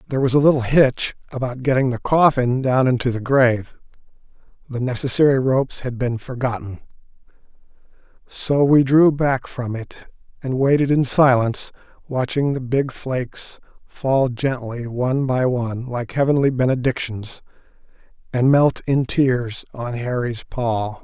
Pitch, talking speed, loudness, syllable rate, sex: 130 Hz, 135 wpm, -19 LUFS, 4.6 syllables/s, male